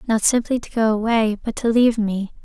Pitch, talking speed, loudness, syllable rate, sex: 225 Hz, 220 wpm, -19 LUFS, 5.6 syllables/s, female